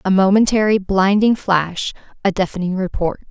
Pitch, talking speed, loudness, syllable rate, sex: 195 Hz, 125 wpm, -17 LUFS, 4.8 syllables/s, female